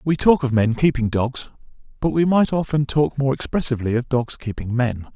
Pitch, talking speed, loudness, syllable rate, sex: 135 Hz, 200 wpm, -20 LUFS, 5.3 syllables/s, male